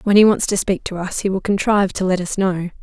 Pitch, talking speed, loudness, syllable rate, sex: 190 Hz, 300 wpm, -18 LUFS, 6.1 syllables/s, female